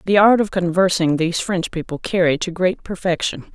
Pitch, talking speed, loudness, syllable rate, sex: 180 Hz, 185 wpm, -19 LUFS, 5.3 syllables/s, female